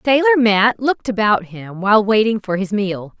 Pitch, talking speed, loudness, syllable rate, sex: 215 Hz, 190 wpm, -16 LUFS, 5.1 syllables/s, female